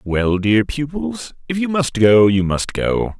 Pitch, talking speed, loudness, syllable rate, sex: 130 Hz, 190 wpm, -17 LUFS, 3.7 syllables/s, male